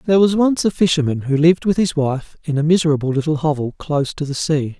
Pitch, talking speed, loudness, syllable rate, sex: 155 Hz, 240 wpm, -18 LUFS, 6.4 syllables/s, male